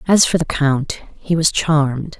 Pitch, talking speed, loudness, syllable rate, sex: 155 Hz, 190 wpm, -17 LUFS, 4.2 syllables/s, female